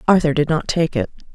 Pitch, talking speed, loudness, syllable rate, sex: 165 Hz, 225 wpm, -19 LUFS, 6.2 syllables/s, female